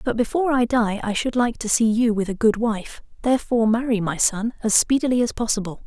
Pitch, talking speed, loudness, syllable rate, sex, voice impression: 230 Hz, 225 wpm, -21 LUFS, 5.9 syllables/s, female, very feminine, young, slightly adult-like, very thin, very relaxed, very weak, dark, very soft, slightly muffled, fluent, cute, intellectual, slightly sincere, calm, friendly, slightly reassuring, unique, elegant, sweet, slightly kind, very modest